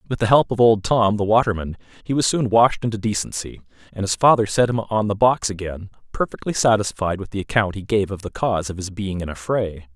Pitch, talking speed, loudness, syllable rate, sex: 105 Hz, 235 wpm, -20 LUFS, 5.9 syllables/s, male